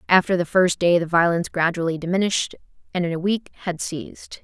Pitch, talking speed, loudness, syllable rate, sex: 175 Hz, 190 wpm, -21 LUFS, 6.2 syllables/s, female